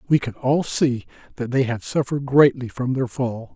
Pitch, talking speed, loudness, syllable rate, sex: 130 Hz, 200 wpm, -21 LUFS, 4.9 syllables/s, male